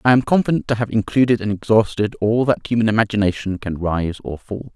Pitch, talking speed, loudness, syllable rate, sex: 110 Hz, 215 wpm, -19 LUFS, 6.1 syllables/s, male